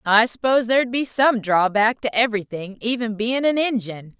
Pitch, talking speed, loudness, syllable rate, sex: 225 Hz, 170 wpm, -20 LUFS, 5.3 syllables/s, female